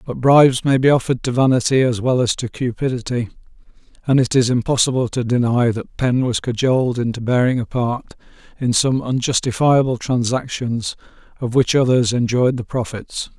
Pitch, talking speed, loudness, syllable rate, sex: 125 Hz, 160 wpm, -18 LUFS, 5.3 syllables/s, male